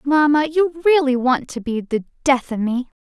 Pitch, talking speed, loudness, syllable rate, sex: 275 Hz, 200 wpm, -19 LUFS, 4.3 syllables/s, female